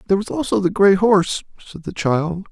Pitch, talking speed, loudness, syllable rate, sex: 180 Hz, 215 wpm, -18 LUFS, 6.0 syllables/s, male